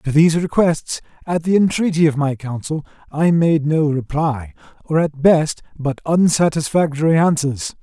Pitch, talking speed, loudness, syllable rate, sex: 155 Hz, 145 wpm, -17 LUFS, 4.6 syllables/s, male